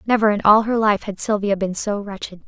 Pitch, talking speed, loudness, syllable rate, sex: 205 Hz, 240 wpm, -19 LUFS, 5.7 syllables/s, female